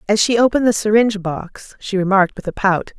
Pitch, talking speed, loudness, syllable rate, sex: 205 Hz, 220 wpm, -16 LUFS, 6.1 syllables/s, female